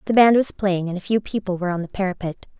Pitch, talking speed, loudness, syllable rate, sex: 195 Hz, 280 wpm, -21 LUFS, 6.8 syllables/s, female